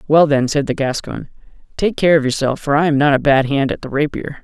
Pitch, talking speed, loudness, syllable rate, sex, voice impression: 145 Hz, 255 wpm, -16 LUFS, 5.8 syllables/s, male, masculine, adult-like, tensed, powerful, slightly bright, clear, fluent, intellectual, sincere, friendly, unique, wild, lively, slightly kind